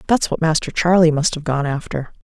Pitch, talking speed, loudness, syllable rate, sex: 160 Hz, 215 wpm, -18 LUFS, 5.6 syllables/s, female